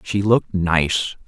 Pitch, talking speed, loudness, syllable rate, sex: 95 Hz, 140 wpm, -19 LUFS, 3.6 syllables/s, male